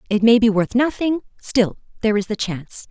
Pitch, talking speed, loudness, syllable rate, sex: 225 Hz, 205 wpm, -19 LUFS, 5.6 syllables/s, female